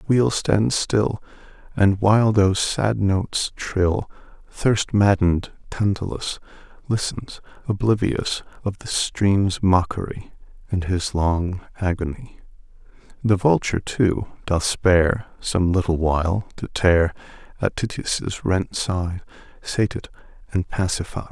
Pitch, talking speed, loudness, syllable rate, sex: 95 Hz, 115 wpm, -22 LUFS, 3.9 syllables/s, male